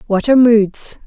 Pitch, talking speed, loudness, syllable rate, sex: 225 Hz, 170 wpm, -12 LUFS, 4.7 syllables/s, female